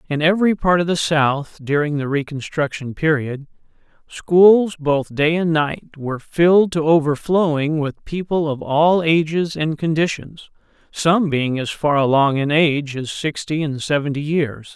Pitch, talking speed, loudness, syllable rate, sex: 155 Hz, 155 wpm, -18 LUFS, 4.4 syllables/s, male